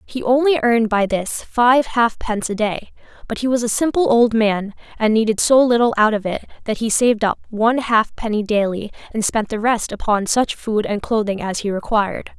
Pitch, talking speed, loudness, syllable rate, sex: 225 Hz, 205 wpm, -18 LUFS, 5.3 syllables/s, female